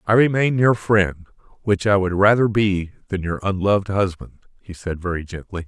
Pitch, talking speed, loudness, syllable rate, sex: 100 Hz, 180 wpm, -20 LUFS, 5.3 syllables/s, male